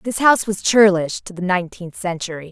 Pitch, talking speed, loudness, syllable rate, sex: 190 Hz, 190 wpm, -18 LUFS, 5.8 syllables/s, female